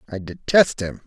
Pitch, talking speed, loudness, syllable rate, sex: 115 Hz, 170 wpm, -19 LUFS, 4.8 syllables/s, male